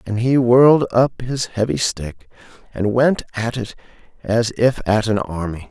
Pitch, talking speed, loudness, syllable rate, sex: 115 Hz, 170 wpm, -18 LUFS, 4.3 syllables/s, male